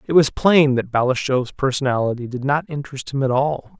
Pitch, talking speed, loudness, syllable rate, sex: 135 Hz, 190 wpm, -19 LUFS, 5.6 syllables/s, male